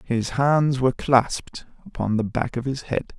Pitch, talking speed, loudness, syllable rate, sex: 125 Hz, 190 wpm, -22 LUFS, 4.5 syllables/s, male